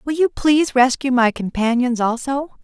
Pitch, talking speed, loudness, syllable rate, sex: 260 Hz, 160 wpm, -18 LUFS, 5.0 syllables/s, female